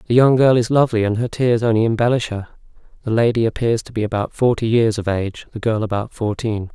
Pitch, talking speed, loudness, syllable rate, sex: 115 Hz, 220 wpm, -18 LUFS, 6.2 syllables/s, male